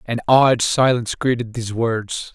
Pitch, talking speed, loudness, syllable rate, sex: 120 Hz, 155 wpm, -18 LUFS, 4.7 syllables/s, male